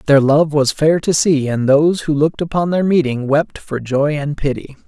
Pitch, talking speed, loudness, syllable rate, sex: 150 Hz, 220 wpm, -16 LUFS, 5.0 syllables/s, male